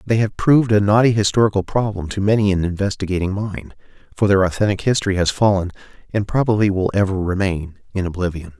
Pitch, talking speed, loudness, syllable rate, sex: 100 Hz, 175 wpm, -18 LUFS, 6.2 syllables/s, male